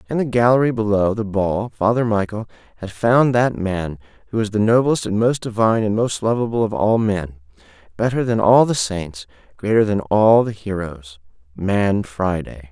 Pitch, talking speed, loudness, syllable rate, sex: 105 Hz, 170 wpm, -18 LUFS, 4.8 syllables/s, male